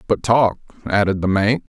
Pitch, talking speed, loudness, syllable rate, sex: 105 Hz, 170 wpm, -18 LUFS, 4.8 syllables/s, male